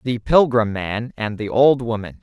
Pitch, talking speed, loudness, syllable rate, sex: 115 Hz, 190 wpm, -19 LUFS, 4.3 syllables/s, male